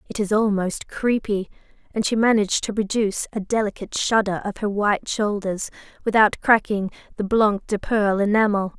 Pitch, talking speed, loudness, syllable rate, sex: 210 Hz, 155 wpm, -21 LUFS, 5.4 syllables/s, female